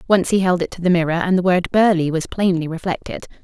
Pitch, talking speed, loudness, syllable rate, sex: 180 Hz, 245 wpm, -18 LUFS, 6.2 syllables/s, female